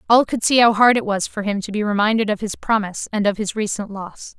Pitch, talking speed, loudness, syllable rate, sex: 215 Hz, 275 wpm, -19 LUFS, 6.0 syllables/s, female